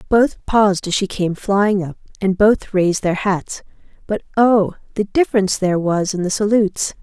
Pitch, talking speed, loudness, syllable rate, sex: 195 Hz, 180 wpm, -17 LUFS, 5.0 syllables/s, female